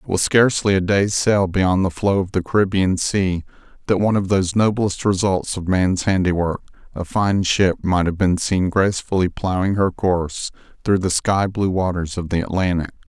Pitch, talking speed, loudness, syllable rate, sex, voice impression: 95 Hz, 185 wpm, -19 LUFS, 5.0 syllables/s, male, masculine, very adult-like, thick, cool, intellectual, slightly refreshing, reassuring, slightly wild